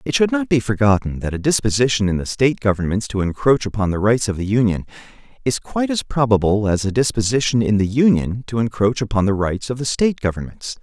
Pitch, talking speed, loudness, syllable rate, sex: 115 Hz, 215 wpm, -19 LUFS, 6.1 syllables/s, male